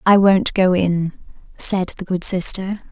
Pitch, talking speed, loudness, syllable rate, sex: 185 Hz, 165 wpm, -17 LUFS, 4.2 syllables/s, female